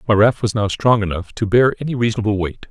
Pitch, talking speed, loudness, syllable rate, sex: 110 Hz, 245 wpm, -18 LUFS, 6.3 syllables/s, male